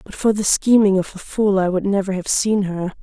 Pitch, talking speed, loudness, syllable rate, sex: 195 Hz, 260 wpm, -18 LUFS, 5.3 syllables/s, female